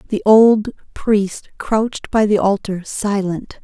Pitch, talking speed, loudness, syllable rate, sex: 205 Hz, 130 wpm, -16 LUFS, 3.6 syllables/s, female